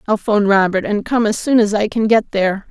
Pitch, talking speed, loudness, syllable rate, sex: 210 Hz, 265 wpm, -16 LUFS, 5.9 syllables/s, female